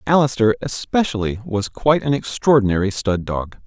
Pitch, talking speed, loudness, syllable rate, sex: 110 Hz, 130 wpm, -19 LUFS, 5.3 syllables/s, male